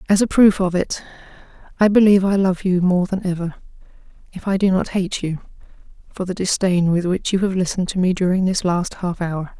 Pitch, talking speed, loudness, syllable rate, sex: 185 Hz, 200 wpm, -19 LUFS, 5.7 syllables/s, female